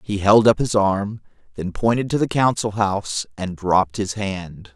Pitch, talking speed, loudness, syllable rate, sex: 100 Hz, 190 wpm, -20 LUFS, 4.5 syllables/s, male